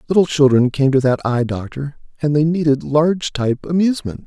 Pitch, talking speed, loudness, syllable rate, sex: 145 Hz, 185 wpm, -17 LUFS, 5.7 syllables/s, male